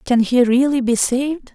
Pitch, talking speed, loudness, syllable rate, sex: 255 Hz, 195 wpm, -17 LUFS, 4.8 syllables/s, female